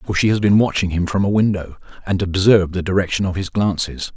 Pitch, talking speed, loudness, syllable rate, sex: 95 Hz, 230 wpm, -18 LUFS, 6.1 syllables/s, male